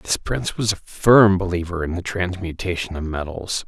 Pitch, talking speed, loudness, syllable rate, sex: 90 Hz, 180 wpm, -21 LUFS, 5.0 syllables/s, male